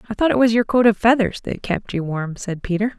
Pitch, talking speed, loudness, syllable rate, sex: 215 Hz, 280 wpm, -19 LUFS, 5.8 syllables/s, female